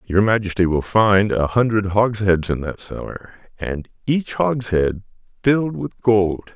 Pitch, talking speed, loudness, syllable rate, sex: 105 Hz, 145 wpm, -19 LUFS, 4.0 syllables/s, male